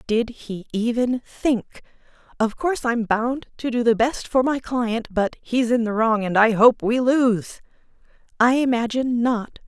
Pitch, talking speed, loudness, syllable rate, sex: 235 Hz, 175 wpm, -21 LUFS, 4.4 syllables/s, female